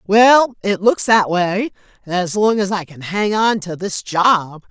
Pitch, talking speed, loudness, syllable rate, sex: 195 Hz, 190 wpm, -16 LUFS, 3.6 syllables/s, female